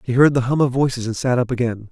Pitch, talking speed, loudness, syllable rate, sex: 125 Hz, 315 wpm, -19 LUFS, 6.6 syllables/s, male